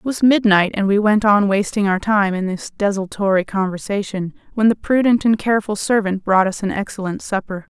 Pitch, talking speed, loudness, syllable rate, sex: 205 Hz, 195 wpm, -18 LUFS, 5.4 syllables/s, female